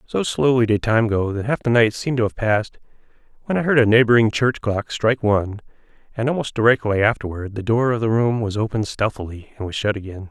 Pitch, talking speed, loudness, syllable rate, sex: 110 Hz, 220 wpm, -19 LUFS, 6.1 syllables/s, male